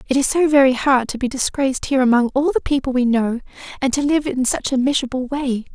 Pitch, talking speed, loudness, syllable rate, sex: 260 Hz, 240 wpm, -18 LUFS, 6.3 syllables/s, female